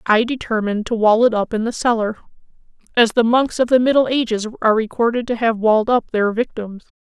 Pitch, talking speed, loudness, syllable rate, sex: 225 Hz, 195 wpm, -17 LUFS, 6.0 syllables/s, female